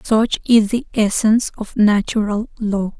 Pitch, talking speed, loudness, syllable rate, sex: 215 Hz, 140 wpm, -17 LUFS, 4.2 syllables/s, female